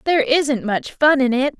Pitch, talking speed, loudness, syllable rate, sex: 265 Hz, 225 wpm, -17 LUFS, 5.0 syllables/s, female